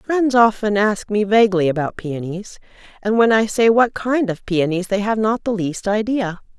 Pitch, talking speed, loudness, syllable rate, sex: 210 Hz, 190 wpm, -18 LUFS, 4.7 syllables/s, female